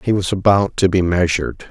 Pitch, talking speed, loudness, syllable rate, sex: 90 Hz, 210 wpm, -16 LUFS, 5.7 syllables/s, male